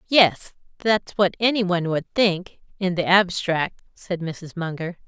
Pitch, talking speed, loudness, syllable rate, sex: 185 Hz, 140 wpm, -22 LUFS, 4.1 syllables/s, female